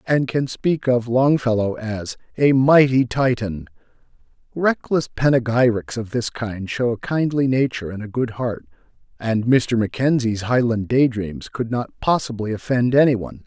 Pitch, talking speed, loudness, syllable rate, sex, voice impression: 120 Hz, 145 wpm, -20 LUFS, 4.5 syllables/s, male, very masculine, very adult-like, very middle-aged, very thick, slightly relaxed, slightly powerful, slightly bright, slightly soft, muffled, slightly fluent, slightly raspy, cool, very intellectual, refreshing, sincere, calm, very mature, friendly, slightly unique, slightly elegant, wild, sweet, slightly lively, kind, slightly sharp